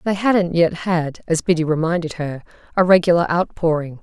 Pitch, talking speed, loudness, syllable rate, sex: 170 Hz, 165 wpm, -18 LUFS, 5.2 syllables/s, female